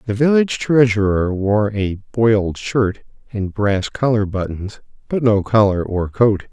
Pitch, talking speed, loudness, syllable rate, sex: 105 Hz, 145 wpm, -17 LUFS, 4.1 syllables/s, male